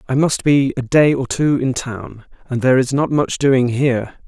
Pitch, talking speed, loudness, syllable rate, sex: 130 Hz, 225 wpm, -16 LUFS, 4.7 syllables/s, male